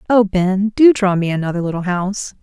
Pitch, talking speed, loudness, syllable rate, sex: 195 Hz, 200 wpm, -16 LUFS, 5.6 syllables/s, female